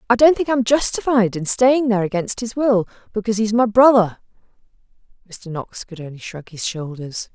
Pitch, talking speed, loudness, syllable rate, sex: 210 Hz, 195 wpm, -18 LUFS, 5.7 syllables/s, female